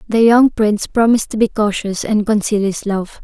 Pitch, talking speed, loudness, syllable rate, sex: 215 Hz, 205 wpm, -15 LUFS, 5.2 syllables/s, female